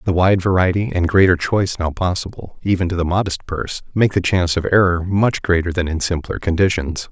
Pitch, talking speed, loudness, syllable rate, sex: 90 Hz, 200 wpm, -18 LUFS, 5.8 syllables/s, male